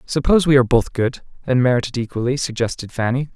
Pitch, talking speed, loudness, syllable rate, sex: 125 Hz, 195 wpm, -19 LUFS, 6.6 syllables/s, male